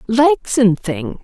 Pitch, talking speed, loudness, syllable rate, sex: 225 Hz, 145 wpm, -16 LUFS, 2.8 syllables/s, female